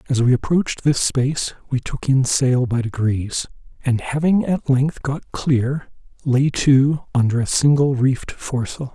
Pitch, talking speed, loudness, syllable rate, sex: 135 Hz, 160 wpm, -19 LUFS, 4.4 syllables/s, male